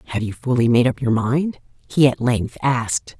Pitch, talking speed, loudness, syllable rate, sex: 125 Hz, 205 wpm, -19 LUFS, 5.0 syllables/s, female